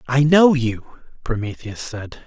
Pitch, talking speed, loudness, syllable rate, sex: 130 Hz, 130 wpm, -19 LUFS, 3.8 syllables/s, male